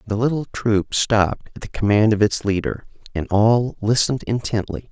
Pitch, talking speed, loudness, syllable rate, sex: 110 Hz, 170 wpm, -20 LUFS, 5.1 syllables/s, male